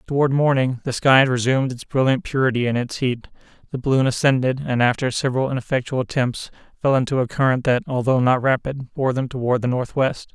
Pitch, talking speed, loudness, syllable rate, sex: 130 Hz, 190 wpm, -20 LUFS, 6.0 syllables/s, male